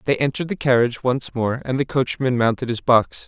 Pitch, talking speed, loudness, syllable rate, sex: 125 Hz, 220 wpm, -20 LUFS, 5.8 syllables/s, male